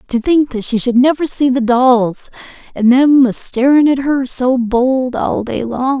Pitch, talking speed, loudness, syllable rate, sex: 255 Hz, 190 wpm, -13 LUFS, 4.0 syllables/s, female